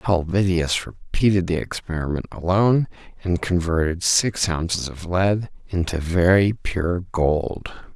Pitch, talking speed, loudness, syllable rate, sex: 90 Hz, 115 wpm, -21 LUFS, 4.1 syllables/s, male